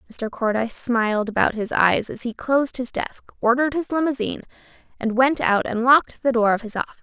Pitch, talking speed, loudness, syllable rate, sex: 240 Hz, 205 wpm, -21 LUFS, 6.1 syllables/s, female